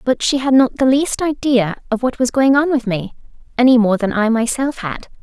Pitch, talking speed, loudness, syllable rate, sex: 250 Hz, 230 wpm, -16 LUFS, 5.3 syllables/s, female